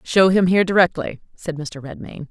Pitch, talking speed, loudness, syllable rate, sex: 170 Hz, 180 wpm, -18 LUFS, 5.3 syllables/s, female